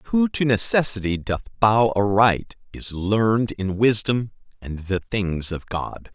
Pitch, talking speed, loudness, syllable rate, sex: 110 Hz, 145 wpm, -21 LUFS, 3.9 syllables/s, male